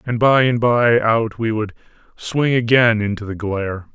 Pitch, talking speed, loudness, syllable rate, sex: 115 Hz, 185 wpm, -17 LUFS, 4.5 syllables/s, male